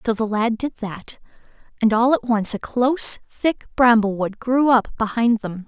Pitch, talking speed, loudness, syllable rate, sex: 230 Hz, 180 wpm, -20 LUFS, 4.5 syllables/s, female